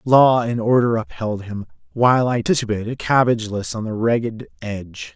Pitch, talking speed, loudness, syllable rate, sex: 115 Hz, 150 wpm, -19 LUFS, 5.2 syllables/s, male